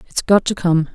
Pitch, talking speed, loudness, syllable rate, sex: 180 Hz, 255 wpm, -17 LUFS, 5.6 syllables/s, female